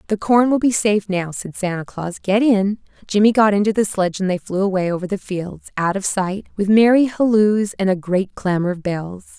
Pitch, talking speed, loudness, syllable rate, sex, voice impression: 200 Hz, 225 wpm, -18 LUFS, 5.3 syllables/s, female, very feminine, adult-like, slightly tensed, clear, slightly intellectual, slightly calm